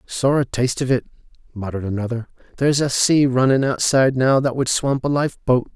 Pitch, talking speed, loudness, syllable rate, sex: 130 Hz, 190 wpm, -19 LUFS, 5.9 syllables/s, male